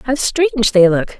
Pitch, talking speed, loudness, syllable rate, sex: 235 Hz, 200 wpm, -14 LUFS, 5.4 syllables/s, female